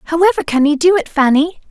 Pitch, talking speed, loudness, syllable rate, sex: 305 Hz, 210 wpm, -13 LUFS, 6.3 syllables/s, female